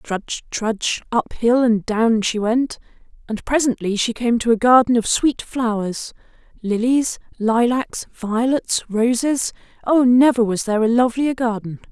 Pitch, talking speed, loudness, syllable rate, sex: 235 Hz, 140 wpm, -19 LUFS, 4.4 syllables/s, female